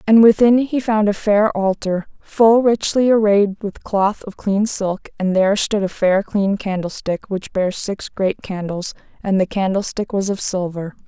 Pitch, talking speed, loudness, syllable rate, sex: 200 Hz, 180 wpm, -18 LUFS, 4.3 syllables/s, female